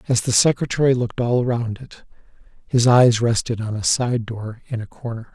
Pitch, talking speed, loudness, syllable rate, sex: 120 Hz, 190 wpm, -20 LUFS, 5.1 syllables/s, male